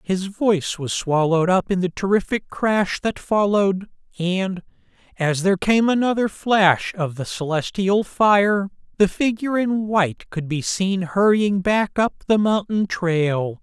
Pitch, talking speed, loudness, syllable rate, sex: 190 Hz, 150 wpm, -20 LUFS, 4.2 syllables/s, male